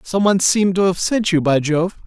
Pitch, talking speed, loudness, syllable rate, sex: 185 Hz, 230 wpm, -17 LUFS, 5.6 syllables/s, male